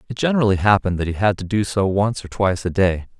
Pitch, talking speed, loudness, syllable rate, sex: 100 Hz, 265 wpm, -19 LUFS, 6.9 syllables/s, male